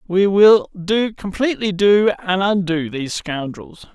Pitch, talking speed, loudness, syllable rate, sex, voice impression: 190 Hz, 135 wpm, -17 LUFS, 4.2 syllables/s, male, masculine, middle-aged, tensed, powerful, clear, fluent, slightly raspy, intellectual, friendly, wild, lively, slightly strict